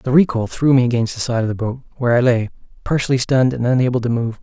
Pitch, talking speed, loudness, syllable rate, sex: 125 Hz, 260 wpm, -17 LUFS, 6.9 syllables/s, male